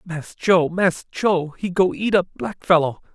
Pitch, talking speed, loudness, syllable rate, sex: 175 Hz, 190 wpm, -20 LUFS, 4.1 syllables/s, male